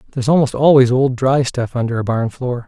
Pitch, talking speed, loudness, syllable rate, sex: 125 Hz, 225 wpm, -16 LUFS, 5.9 syllables/s, male